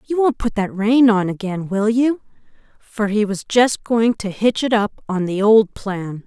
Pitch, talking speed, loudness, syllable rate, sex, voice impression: 215 Hz, 210 wpm, -18 LUFS, 4.2 syllables/s, female, very feminine, middle-aged, thin, tensed, powerful, slightly bright, hard, clear, fluent, cool, very intellectual, refreshing, sincere, very calm, friendly, reassuring, unique, slightly elegant, wild, slightly sweet, lively, strict, slightly intense, sharp